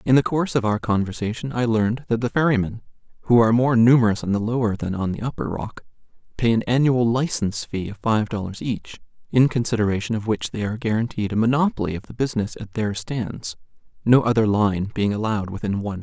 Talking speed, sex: 220 wpm, male